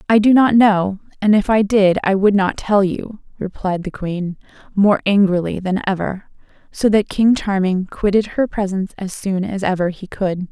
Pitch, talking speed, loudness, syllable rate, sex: 195 Hz, 190 wpm, -17 LUFS, 4.6 syllables/s, female